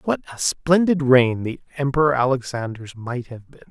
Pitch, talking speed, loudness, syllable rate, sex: 135 Hz, 160 wpm, -20 LUFS, 5.0 syllables/s, male